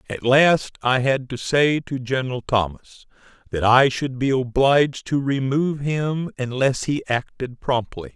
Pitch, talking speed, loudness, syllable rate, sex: 130 Hz, 155 wpm, -21 LUFS, 4.2 syllables/s, male